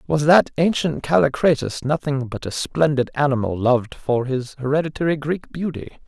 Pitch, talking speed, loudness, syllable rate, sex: 145 Hz, 150 wpm, -20 LUFS, 5.1 syllables/s, male